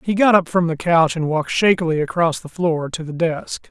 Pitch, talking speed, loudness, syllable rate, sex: 165 Hz, 245 wpm, -18 LUFS, 5.3 syllables/s, male